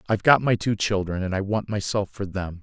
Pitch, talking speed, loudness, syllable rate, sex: 105 Hz, 250 wpm, -23 LUFS, 5.7 syllables/s, male